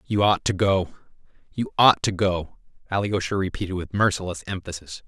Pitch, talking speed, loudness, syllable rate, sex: 95 Hz, 155 wpm, -23 LUFS, 5.4 syllables/s, male